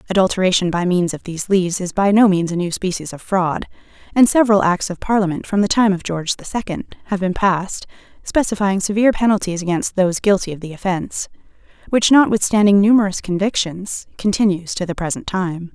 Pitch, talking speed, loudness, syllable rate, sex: 190 Hz, 185 wpm, -18 LUFS, 6.0 syllables/s, female